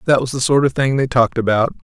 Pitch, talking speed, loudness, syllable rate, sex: 130 Hz, 275 wpm, -16 LUFS, 7.0 syllables/s, male